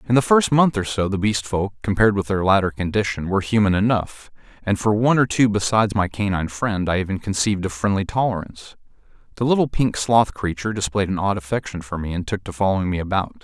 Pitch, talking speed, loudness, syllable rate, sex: 100 Hz, 220 wpm, -20 LUFS, 6.4 syllables/s, male